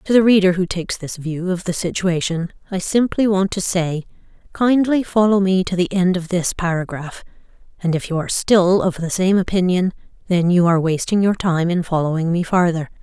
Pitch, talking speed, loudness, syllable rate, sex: 180 Hz, 200 wpm, -18 LUFS, 5.3 syllables/s, female